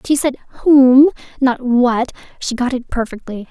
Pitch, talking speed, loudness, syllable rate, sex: 255 Hz, 155 wpm, -15 LUFS, 4.3 syllables/s, female